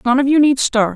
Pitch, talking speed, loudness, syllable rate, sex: 260 Hz, 315 wpm, -14 LUFS, 6.0 syllables/s, female